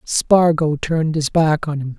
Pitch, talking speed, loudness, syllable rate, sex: 155 Hz, 180 wpm, -17 LUFS, 4.2 syllables/s, male